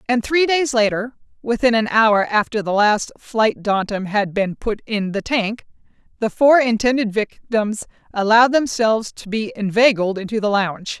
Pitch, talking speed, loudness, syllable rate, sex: 225 Hz, 165 wpm, -18 LUFS, 4.7 syllables/s, female